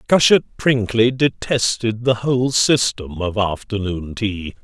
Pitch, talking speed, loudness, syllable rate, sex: 115 Hz, 115 wpm, -18 LUFS, 4.0 syllables/s, male